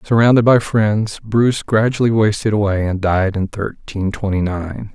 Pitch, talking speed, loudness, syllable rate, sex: 105 Hz, 160 wpm, -16 LUFS, 4.6 syllables/s, male